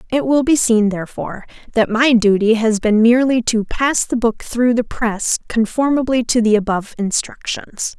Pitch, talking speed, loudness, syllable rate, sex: 230 Hz, 175 wpm, -16 LUFS, 4.9 syllables/s, female